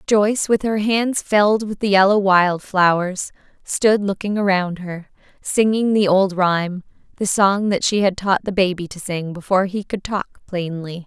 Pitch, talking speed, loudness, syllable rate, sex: 195 Hz, 180 wpm, -18 LUFS, 4.6 syllables/s, female